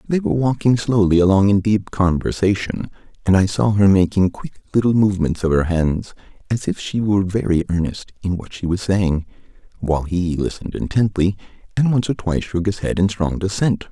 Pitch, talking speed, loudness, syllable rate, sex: 95 Hz, 190 wpm, -19 LUFS, 5.5 syllables/s, male